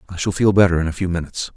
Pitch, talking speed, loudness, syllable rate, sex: 90 Hz, 310 wpm, -18 LUFS, 8.2 syllables/s, male